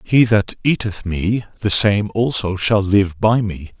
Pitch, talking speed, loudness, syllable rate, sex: 100 Hz, 175 wpm, -17 LUFS, 3.8 syllables/s, male